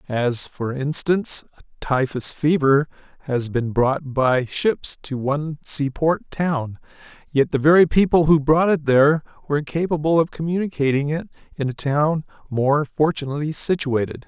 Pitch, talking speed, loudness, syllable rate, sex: 145 Hz, 145 wpm, -20 LUFS, 4.7 syllables/s, male